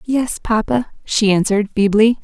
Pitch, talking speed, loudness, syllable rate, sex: 220 Hz, 135 wpm, -17 LUFS, 4.6 syllables/s, female